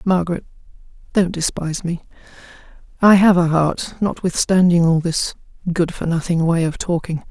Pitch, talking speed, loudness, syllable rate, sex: 175 Hz, 140 wpm, -18 LUFS, 5.1 syllables/s, female